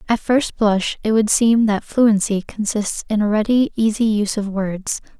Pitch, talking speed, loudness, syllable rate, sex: 215 Hz, 185 wpm, -18 LUFS, 4.5 syllables/s, female